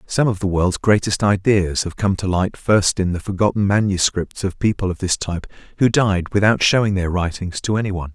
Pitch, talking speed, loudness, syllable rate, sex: 95 Hz, 215 wpm, -19 LUFS, 5.5 syllables/s, male